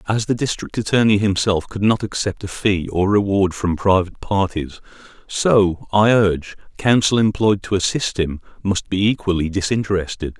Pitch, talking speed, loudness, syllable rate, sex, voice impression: 100 Hz, 155 wpm, -19 LUFS, 5.0 syllables/s, male, very masculine, very adult-like, middle-aged, very thick, slightly tensed, slightly powerful, slightly dark, soft, muffled, slightly fluent, very cool, very intellectual, very sincere, very calm, very mature, friendly, very reassuring, slightly unique, elegant, sweet, very kind